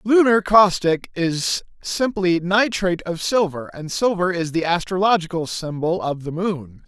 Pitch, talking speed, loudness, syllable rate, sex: 180 Hz, 140 wpm, -20 LUFS, 4.4 syllables/s, male